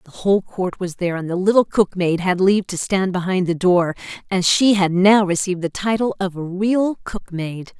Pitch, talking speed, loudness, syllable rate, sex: 185 Hz, 225 wpm, -19 LUFS, 5.2 syllables/s, female